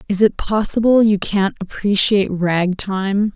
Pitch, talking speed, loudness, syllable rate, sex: 200 Hz, 145 wpm, -17 LUFS, 4.2 syllables/s, female